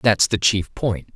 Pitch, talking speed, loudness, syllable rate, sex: 105 Hz, 205 wpm, -20 LUFS, 4.0 syllables/s, male